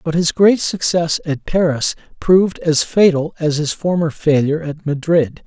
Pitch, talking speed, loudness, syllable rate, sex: 160 Hz, 165 wpm, -16 LUFS, 4.5 syllables/s, male